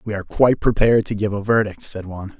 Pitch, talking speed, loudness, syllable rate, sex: 105 Hz, 275 wpm, -19 LUFS, 7.6 syllables/s, male